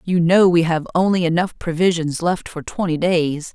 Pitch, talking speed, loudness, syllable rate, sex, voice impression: 170 Hz, 185 wpm, -18 LUFS, 4.7 syllables/s, female, feminine, very adult-like, cool, calm, elegant, slightly sweet